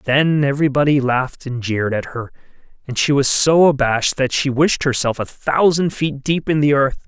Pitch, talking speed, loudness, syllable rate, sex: 140 Hz, 195 wpm, -17 LUFS, 5.2 syllables/s, male